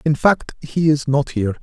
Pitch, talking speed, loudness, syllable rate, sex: 145 Hz, 220 wpm, -18 LUFS, 5.0 syllables/s, male